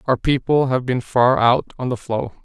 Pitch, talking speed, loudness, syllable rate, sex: 125 Hz, 220 wpm, -19 LUFS, 4.6 syllables/s, male